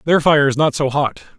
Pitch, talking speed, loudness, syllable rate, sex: 145 Hz, 260 wpm, -16 LUFS, 5.3 syllables/s, male